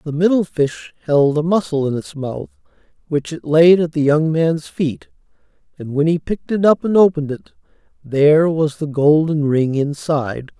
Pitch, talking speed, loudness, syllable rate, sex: 155 Hz, 180 wpm, -17 LUFS, 4.9 syllables/s, male